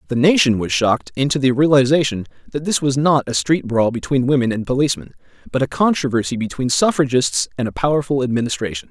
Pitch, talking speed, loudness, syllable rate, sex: 135 Hz, 180 wpm, -18 LUFS, 6.3 syllables/s, male